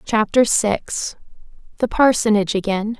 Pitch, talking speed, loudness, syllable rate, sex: 215 Hz, 80 wpm, -18 LUFS, 4.4 syllables/s, female